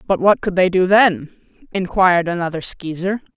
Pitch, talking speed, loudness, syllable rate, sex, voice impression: 185 Hz, 160 wpm, -17 LUFS, 5.0 syllables/s, female, feminine, adult-like, tensed, powerful, clear, slightly raspy, slightly intellectual, unique, slightly wild, lively, slightly strict, intense, sharp